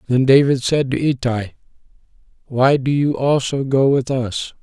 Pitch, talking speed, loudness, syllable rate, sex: 135 Hz, 155 wpm, -17 LUFS, 4.4 syllables/s, male